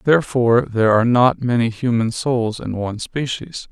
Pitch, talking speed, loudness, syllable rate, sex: 120 Hz, 160 wpm, -18 LUFS, 5.2 syllables/s, male